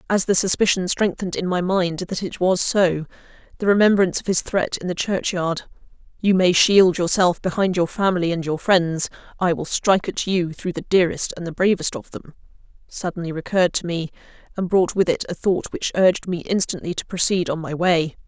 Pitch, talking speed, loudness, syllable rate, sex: 180 Hz, 200 wpm, -20 LUFS, 5.5 syllables/s, female